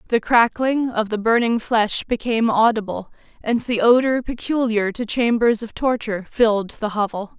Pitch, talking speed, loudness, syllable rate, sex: 225 Hz, 155 wpm, -19 LUFS, 4.9 syllables/s, female